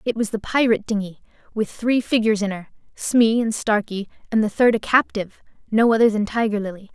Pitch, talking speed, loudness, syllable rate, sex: 220 Hz, 200 wpm, -20 LUFS, 5.8 syllables/s, female